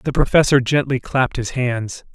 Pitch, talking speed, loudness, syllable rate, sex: 125 Hz, 170 wpm, -18 LUFS, 4.9 syllables/s, male